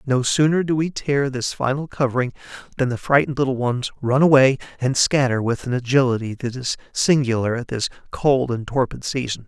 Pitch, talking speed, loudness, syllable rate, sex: 130 Hz, 185 wpm, -20 LUFS, 5.5 syllables/s, male